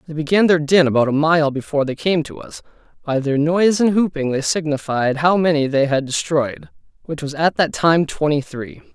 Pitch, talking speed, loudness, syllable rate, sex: 155 Hz, 210 wpm, -18 LUFS, 4.7 syllables/s, male